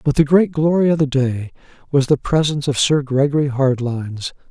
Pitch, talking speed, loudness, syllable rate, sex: 140 Hz, 185 wpm, -17 LUFS, 5.4 syllables/s, male